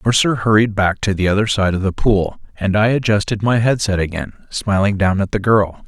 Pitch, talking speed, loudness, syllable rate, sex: 100 Hz, 225 wpm, -17 LUFS, 5.3 syllables/s, male